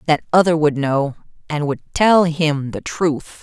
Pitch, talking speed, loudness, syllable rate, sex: 155 Hz, 175 wpm, -18 LUFS, 4.0 syllables/s, female